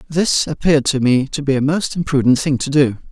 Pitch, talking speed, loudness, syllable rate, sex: 140 Hz, 230 wpm, -16 LUFS, 5.6 syllables/s, male